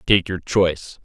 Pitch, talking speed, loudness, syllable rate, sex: 90 Hz, 175 wpm, -20 LUFS, 4.4 syllables/s, male